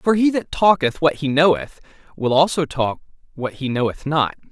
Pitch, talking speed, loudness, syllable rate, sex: 150 Hz, 185 wpm, -19 LUFS, 5.0 syllables/s, male